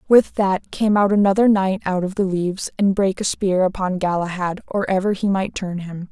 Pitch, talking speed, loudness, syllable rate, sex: 190 Hz, 215 wpm, -20 LUFS, 5.2 syllables/s, female